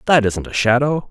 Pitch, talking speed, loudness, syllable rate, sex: 125 Hz, 215 wpm, -17 LUFS, 5.3 syllables/s, male